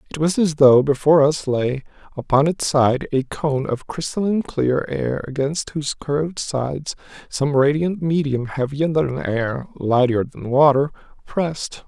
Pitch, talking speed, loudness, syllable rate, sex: 145 Hz, 150 wpm, -20 LUFS, 4.4 syllables/s, male